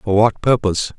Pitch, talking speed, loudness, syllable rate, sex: 105 Hz, 180 wpm, -17 LUFS, 5.4 syllables/s, male